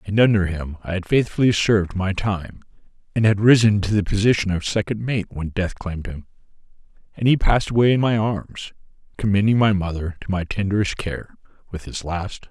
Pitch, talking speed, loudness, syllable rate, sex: 100 Hz, 190 wpm, -20 LUFS, 5.5 syllables/s, male